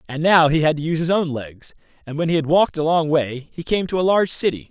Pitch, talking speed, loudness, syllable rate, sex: 160 Hz, 295 wpm, -19 LUFS, 6.4 syllables/s, male